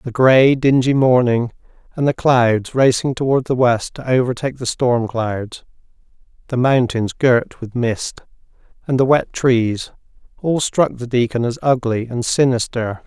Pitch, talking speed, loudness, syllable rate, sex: 125 Hz, 150 wpm, -17 LUFS, 4.3 syllables/s, male